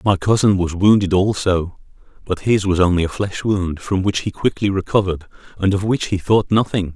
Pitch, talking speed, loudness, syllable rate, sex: 95 Hz, 200 wpm, -18 LUFS, 5.3 syllables/s, male